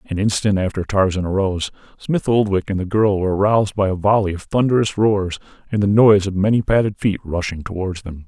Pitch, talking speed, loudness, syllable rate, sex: 100 Hz, 205 wpm, -18 LUFS, 6.0 syllables/s, male